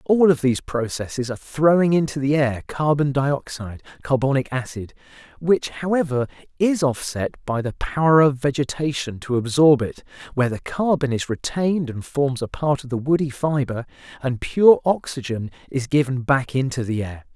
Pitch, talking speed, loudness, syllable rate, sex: 140 Hz, 165 wpm, -21 LUFS, 4.9 syllables/s, male